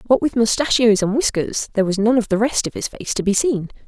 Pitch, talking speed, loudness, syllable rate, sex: 220 Hz, 265 wpm, -18 LUFS, 6.1 syllables/s, female